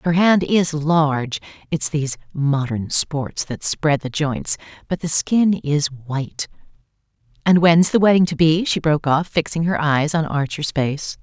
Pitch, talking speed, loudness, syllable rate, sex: 155 Hz, 155 wpm, -19 LUFS, 4.3 syllables/s, female